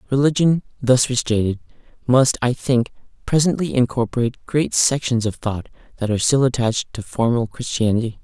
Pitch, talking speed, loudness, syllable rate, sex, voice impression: 125 Hz, 140 wpm, -19 LUFS, 5.5 syllables/s, male, masculine, adult-like, relaxed, weak, slightly dark, soft, raspy, intellectual, calm, reassuring, slightly wild, kind, modest